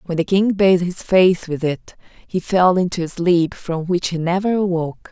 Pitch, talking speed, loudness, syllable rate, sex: 180 Hz, 210 wpm, -18 LUFS, 4.9 syllables/s, female